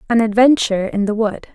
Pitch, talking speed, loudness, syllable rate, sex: 220 Hz, 195 wpm, -16 LUFS, 6.1 syllables/s, female